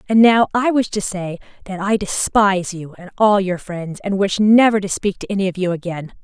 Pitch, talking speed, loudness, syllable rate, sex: 195 Hz, 230 wpm, -17 LUFS, 5.3 syllables/s, female